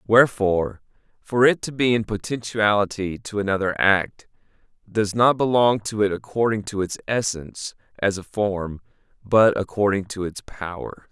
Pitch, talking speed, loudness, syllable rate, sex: 105 Hz, 145 wpm, -22 LUFS, 4.7 syllables/s, male